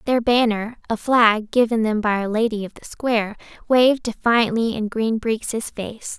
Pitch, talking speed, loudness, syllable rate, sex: 225 Hz, 175 wpm, -20 LUFS, 4.4 syllables/s, female